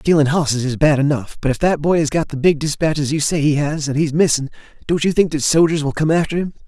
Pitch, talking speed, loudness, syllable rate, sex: 150 Hz, 270 wpm, -17 LUFS, 6.2 syllables/s, male